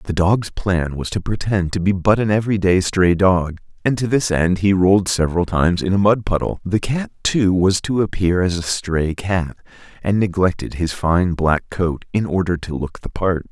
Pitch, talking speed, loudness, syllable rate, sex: 95 Hz, 210 wpm, -18 LUFS, 4.8 syllables/s, male